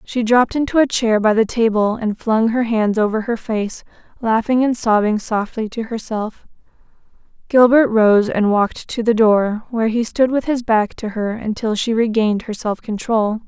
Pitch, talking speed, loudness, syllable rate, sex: 225 Hz, 185 wpm, -17 LUFS, 4.8 syllables/s, female